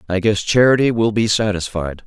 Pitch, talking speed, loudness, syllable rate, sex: 105 Hz, 175 wpm, -17 LUFS, 5.4 syllables/s, male